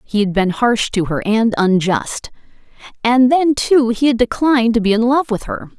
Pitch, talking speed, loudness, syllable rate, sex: 230 Hz, 205 wpm, -15 LUFS, 4.7 syllables/s, female